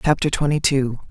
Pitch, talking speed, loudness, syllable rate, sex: 140 Hz, 160 wpm, -20 LUFS, 5.4 syllables/s, female